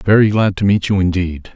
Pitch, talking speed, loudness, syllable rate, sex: 95 Hz, 230 wpm, -15 LUFS, 5.5 syllables/s, male